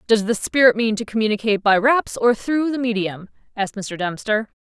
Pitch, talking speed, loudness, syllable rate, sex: 220 Hz, 195 wpm, -19 LUFS, 5.6 syllables/s, female